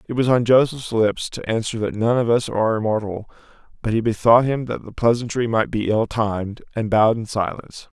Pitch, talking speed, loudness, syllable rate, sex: 115 Hz, 210 wpm, -20 LUFS, 5.7 syllables/s, male